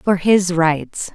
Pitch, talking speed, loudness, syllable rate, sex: 180 Hz, 155 wpm, -16 LUFS, 2.7 syllables/s, female